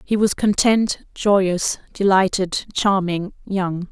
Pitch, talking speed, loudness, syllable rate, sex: 195 Hz, 105 wpm, -19 LUFS, 3.3 syllables/s, female